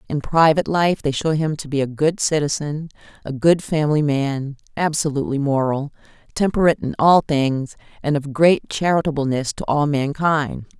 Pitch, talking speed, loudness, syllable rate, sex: 150 Hz, 155 wpm, -19 LUFS, 5.1 syllables/s, female